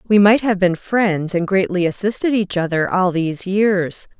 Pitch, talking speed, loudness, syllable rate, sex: 190 Hz, 185 wpm, -17 LUFS, 4.5 syllables/s, female